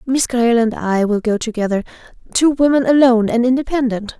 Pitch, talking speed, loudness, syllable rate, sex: 240 Hz, 155 wpm, -16 LUFS, 5.9 syllables/s, female